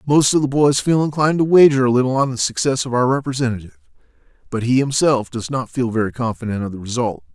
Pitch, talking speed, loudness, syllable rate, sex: 130 Hz, 220 wpm, -18 LUFS, 6.6 syllables/s, male